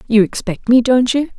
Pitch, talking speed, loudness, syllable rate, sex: 235 Hz, 215 wpm, -14 LUFS, 5.2 syllables/s, female